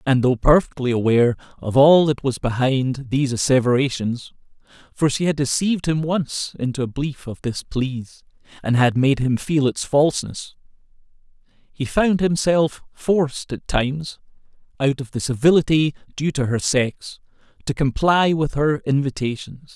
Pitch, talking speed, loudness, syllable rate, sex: 140 Hz, 150 wpm, -20 LUFS, 4.2 syllables/s, male